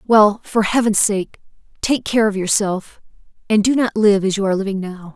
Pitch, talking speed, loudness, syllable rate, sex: 205 Hz, 200 wpm, -17 LUFS, 5.1 syllables/s, female